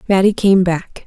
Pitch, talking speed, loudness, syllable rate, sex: 190 Hz, 170 wpm, -14 LUFS, 4.5 syllables/s, female